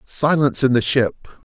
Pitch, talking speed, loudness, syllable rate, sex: 135 Hz, 160 wpm, -18 LUFS, 5.7 syllables/s, male